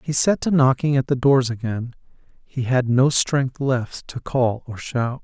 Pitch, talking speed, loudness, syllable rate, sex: 130 Hz, 195 wpm, -20 LUFS, 4.1 syllables/s, male